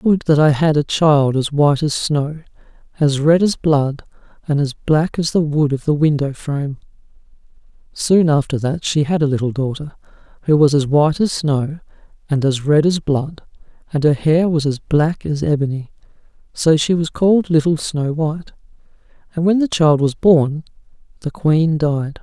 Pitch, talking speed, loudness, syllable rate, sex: 150 Hz, 180 wpm, -16 LUFS, 4.8 syllables/s, male